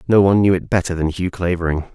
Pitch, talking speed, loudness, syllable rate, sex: 90 Hz, 245 wpm, -18 LUFS, 7.0 syllables/s, male